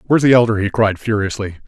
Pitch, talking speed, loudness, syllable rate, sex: 110 Hz, 215 wpm, -16 LUFS, 6.9 syllables/s, male